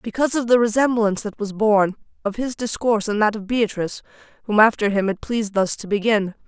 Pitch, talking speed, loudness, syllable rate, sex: 215 Hz, 205 wpm, -20 LUFS, 6.1 syllables/s, female